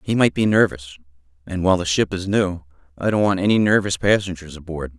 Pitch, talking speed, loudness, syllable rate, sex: 90 Hz, 205 wpm, -19 LUFS, 6.1 syllables/s, male